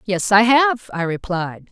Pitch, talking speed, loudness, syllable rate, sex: 210 Hz, 175 wpm, -17 LUFS, 3.8 syllables/s, female